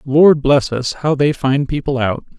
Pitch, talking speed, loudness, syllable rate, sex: 140 Hz, 200 wpm, -15 LUFS, 4.1 syllables/s, male